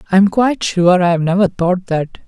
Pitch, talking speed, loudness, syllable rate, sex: 185 Hz, 210 wpm, -14 LUFS, 5.0 syllables/s, male